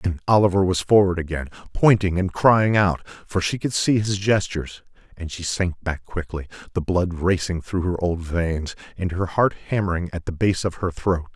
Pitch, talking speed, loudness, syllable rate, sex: 90 Hz, 195 wpm, -22 LUFS, 4.9 syllables/s, male